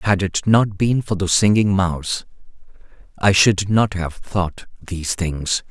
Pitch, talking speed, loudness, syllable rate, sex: 95 Hz, 160 wpm, -19 LUFS, 4.1 syllables/s, male